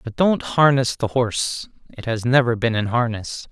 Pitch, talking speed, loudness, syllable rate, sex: 120 Hz, 190 wpm, -20 LUFS, 4.8 syllables/s, male